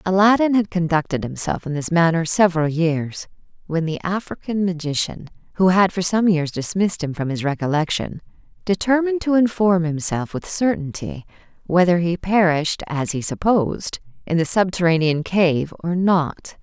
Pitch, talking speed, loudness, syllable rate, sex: 175 Hz, 150 wpm, -20 LUFS, 5.0 syllables/s, female